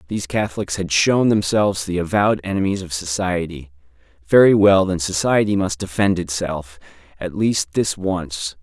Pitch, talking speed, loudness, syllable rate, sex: 90 Hz, 145 wpm, -19 LUFS, 5.0 syllables/s, male